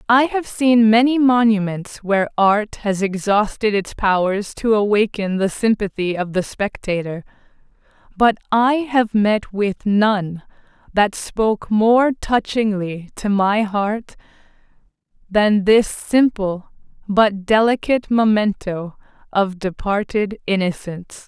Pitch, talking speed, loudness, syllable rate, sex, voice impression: 210 Hz, 115 wpm, -18 LUFS, 3.8 syllables/s, female, feminine, slightly young, adult-like, thin, tensed, slightly powerful, bright, hard, clear, fluent, cute, intellectual, slightly refreshing, calm, slightly friendly, reassuring, slightly wild, kind